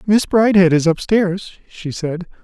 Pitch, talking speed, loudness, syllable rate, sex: 185 Hz, 170 wpm, -15 LUFS, 4.4 syllables/s, male